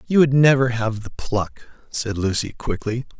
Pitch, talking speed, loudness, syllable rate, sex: 120 Hz, 170 wpm, -21 LUFS, 4.5 syllables/s, male